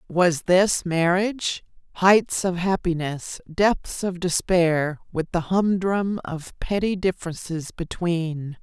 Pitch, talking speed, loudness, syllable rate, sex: 180 Hz, 105 wpm, -23 LUFS, 3.5 syllables/s, female